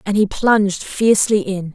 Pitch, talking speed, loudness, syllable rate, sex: 205 Hz, 170 wpm, -16 LUFS, 4.9 syllables/s, female